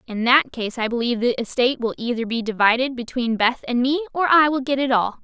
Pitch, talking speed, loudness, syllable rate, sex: 245 Hz, 240 wpm, -20 LUFS, 6.0 syllables/s, female